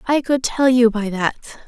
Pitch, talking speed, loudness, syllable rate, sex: 240 Hz, 215 wpm, -18 LUFS, 4.9 syllables/s, female